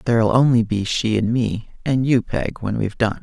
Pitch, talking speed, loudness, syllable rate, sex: 115 Hz, 205 wpm, -20 LUFS, 5.2 syllables/s, male